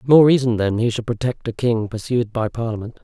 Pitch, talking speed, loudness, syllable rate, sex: 115 Hz, 215 wpm, -19 LUFS, 5.6 syllables/s, male